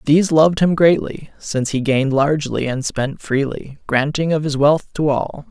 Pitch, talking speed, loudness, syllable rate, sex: 145 Hz, 185 wpm, -17 LUFS, 5.1 syllables/s, male